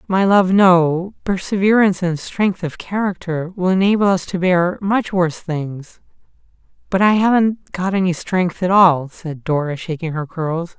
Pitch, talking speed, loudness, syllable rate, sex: 180 Hz, 160 wpm, -17 LUFS, 4.4 syllables/s, male